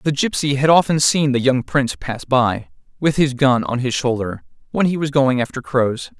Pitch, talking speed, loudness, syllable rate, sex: 135 Hz, 215 wpm, -18 LUFS, 5.0 syllables/s, male